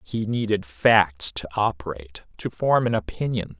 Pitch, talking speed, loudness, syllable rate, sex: 100 Hz, 150 wpm, -23 LUFS, 4.6 syllables/s, male